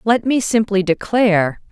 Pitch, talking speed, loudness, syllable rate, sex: 210 Hz, 140 wpm, -16 LUFS, 4.6 syllables/s, female